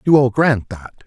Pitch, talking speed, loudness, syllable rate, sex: 125 Hz, 225 wpm, -16 LUFS, 4.4 syllables/s, male